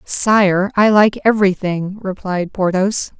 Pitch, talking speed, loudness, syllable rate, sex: 195 Hz, 115 wpm, -15 LUFS, 3.8 syllables/s, female